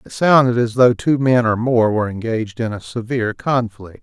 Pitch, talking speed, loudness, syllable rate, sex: 115 Hz, 210 wpm, -17 LUFS, 5.4 syllables/s, male